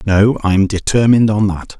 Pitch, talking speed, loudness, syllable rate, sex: 105 Hz, 165 wpm, -13 LUFS, 4.9 syllables/s, male